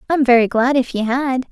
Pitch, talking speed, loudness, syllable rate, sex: 255 Hz, 280 wpm, -16 LUFS, 6.3 syllables/s, female